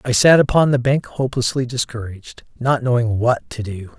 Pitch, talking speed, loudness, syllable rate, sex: 120 Hz, 180 wpm, -18 LUFS, 5.4 syllables/s, male